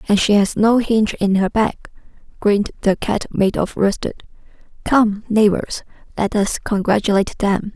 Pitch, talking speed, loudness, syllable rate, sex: 205 Hz, 155 wpm, -18 LUFS, 4.7 syllables/s, female